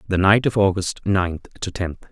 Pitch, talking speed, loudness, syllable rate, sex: 95 Hz, 200 wpm, -20 LUFS, 4.9 syllables/s, male